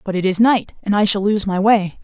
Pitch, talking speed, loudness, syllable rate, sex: 200 Hz, 295 wpm, -16 LUFS, 5.4 syllables/s, female